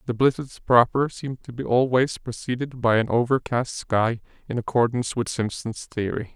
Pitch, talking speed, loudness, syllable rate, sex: 120 Hz, 160 wpm, -23 LUFS, 4.9 syllables/s, male